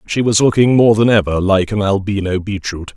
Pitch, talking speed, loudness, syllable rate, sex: 100 Hz, 205 wpm, -14 LUFS, 5.3 syllables/s, male